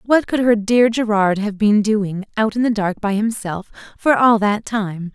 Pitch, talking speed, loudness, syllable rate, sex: 215 Hz, 210 wpm, -17 LUFS, 4.3 syllables/s, female